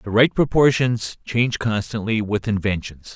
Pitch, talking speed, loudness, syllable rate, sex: 110 Hz, 135 wpm, -20 LUFS, 4.6 syllables/s, male